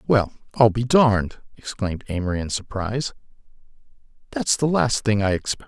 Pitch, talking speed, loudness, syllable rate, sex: 115 Hz, 150 wpm, -22 LUFS, 5.9 syllables/s, male